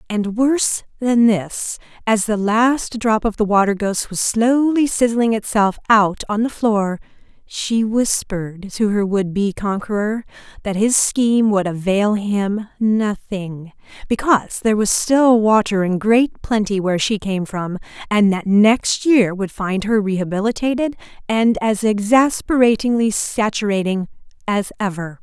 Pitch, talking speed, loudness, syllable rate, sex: 210 Hz, 145 wpm, -18 LUFS, 4.2 syllables/s, female